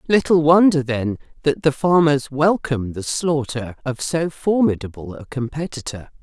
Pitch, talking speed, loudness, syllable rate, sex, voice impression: 145 Hz, 135 wpm, -19 LUFS, 4.6 syllables/s, female, feminine, middle-aged, tensed, slightly powerful, muffled, raspy, calm, friendly, elegant, lively